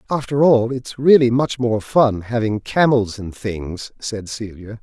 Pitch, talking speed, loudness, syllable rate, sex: 115 Hz, 160 wpm, -18 LUFS, 4.0 syllables/s, male